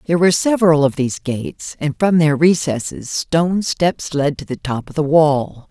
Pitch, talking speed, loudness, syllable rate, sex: 155 Hz, 200 wpm, -17 LUFS, 5.1 syllables/s, female